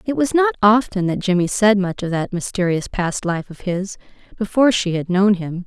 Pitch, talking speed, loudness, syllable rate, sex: 195 Hz, 210 wpm, -18 LUFS, 5.1 syllables/s, female